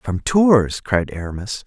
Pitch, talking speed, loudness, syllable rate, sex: 110 Hz, 145 wpm, -18 LUFS, 3.7 syllables/s, male